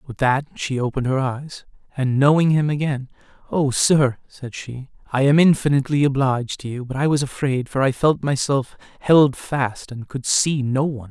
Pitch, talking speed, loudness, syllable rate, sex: 135 Hz, 190 wpm, -20 LUFS, 4.9 syllables/s, male